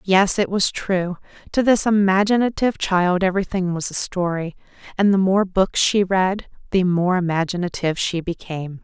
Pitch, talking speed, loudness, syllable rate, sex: 185 Hz, 155 wpm, -20 LUFS, 5.0 syllables/s, female